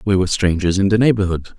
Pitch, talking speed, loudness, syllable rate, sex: 95 Hz, 225 wpm, -17 LUFS, 7.4 syllables/s, male